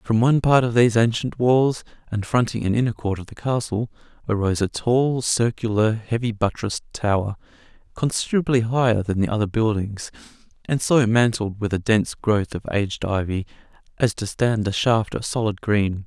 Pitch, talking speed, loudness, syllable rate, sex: 110 Hz, 170 wpm, -21 LUFS, 5.3 syllables/s, male